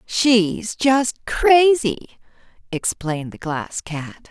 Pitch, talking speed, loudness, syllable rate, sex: 220 Hz, 100 wpm, -19 LUFS, 3.0 syllables/s, female